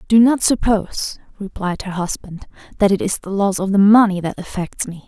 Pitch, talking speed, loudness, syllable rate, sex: 195 Hz, 200 wpm, -18 LUFS, 5.3 syllables/s, female